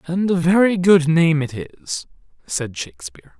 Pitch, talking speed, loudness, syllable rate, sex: 150 Hz, 160 wpm, -18 LUFS, 4.6 syllables/s, male